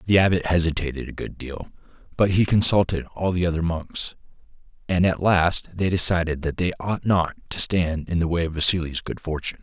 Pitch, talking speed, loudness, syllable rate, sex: 85 Hz, 195 wpm, -22 LUFS, 5.5 syllables/s, male